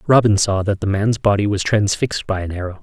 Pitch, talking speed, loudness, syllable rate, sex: 100 Hz, 235 wpm, -18 LUFS, 6.0 syllables/s, male